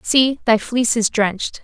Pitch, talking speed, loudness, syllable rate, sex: 230 Hz, 185 wpm, -17 LUFS, 4.8 syllables/s, female